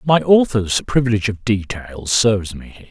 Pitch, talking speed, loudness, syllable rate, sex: 110 Hz, 165 wpm, -17 LUFS, 5.4 syllables/s, male